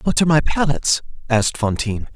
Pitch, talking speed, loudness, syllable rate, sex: 135 Hz, 165 wpm, -19 LUFS, 6.9 syllables/s, male